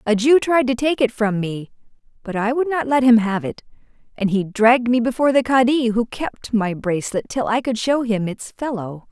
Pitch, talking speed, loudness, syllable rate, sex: 235 Hz, 225 wpm, -19 LUFS, 5.2 syllables/s, female